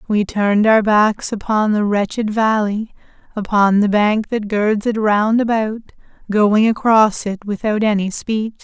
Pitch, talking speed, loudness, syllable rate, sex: 210 Hz, 155 wpm, -16 LUFS, 4.2 syllables/s, female